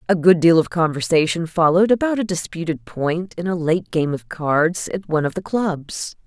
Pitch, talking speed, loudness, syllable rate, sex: 165 Hz, 200 wpm, -19 LUFS, 5.0 syllables/s, female